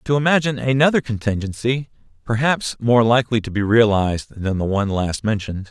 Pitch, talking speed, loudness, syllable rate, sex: 115 Hz, 160 wpm, -19 LUFS, 5.9 syllables/s, male